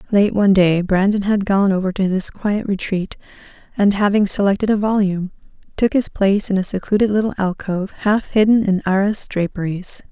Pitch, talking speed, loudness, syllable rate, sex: 200 Hz, 170 wpm, -18 LUFS, 5.5 syllables/s, female